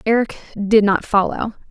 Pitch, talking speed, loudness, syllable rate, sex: 210 Hz, 140 wpm, -18 LUFS, 4.7 syllables/s, female